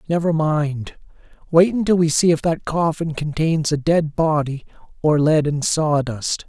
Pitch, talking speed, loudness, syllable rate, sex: 155 Hz, 150 wpm, -19 LUFS, 4.3 syllables/s, male